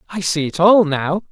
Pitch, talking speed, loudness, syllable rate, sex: 170 Hz, 230 wpm, -16 LUFS, 4.9 syllables/s, male